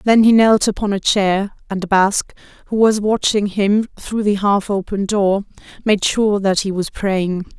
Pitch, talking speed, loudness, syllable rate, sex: 200 Hz, 180 wpm, -17 LUFS, 4.1 syllables/s, female